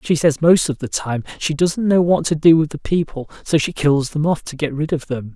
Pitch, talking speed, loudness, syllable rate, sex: 150 Hz, 280 wpm, -18 LUFS, 5.2 syllables/s, male